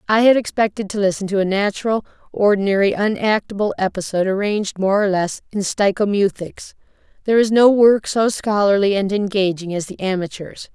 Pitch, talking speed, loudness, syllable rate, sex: 200 Hz, 155 wpm, -18 LUFS, 5.6 syllables/s, female